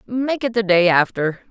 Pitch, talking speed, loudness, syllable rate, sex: 205 Hz, 200 wpm, -18 LUFS, 4.4 syllables/s, female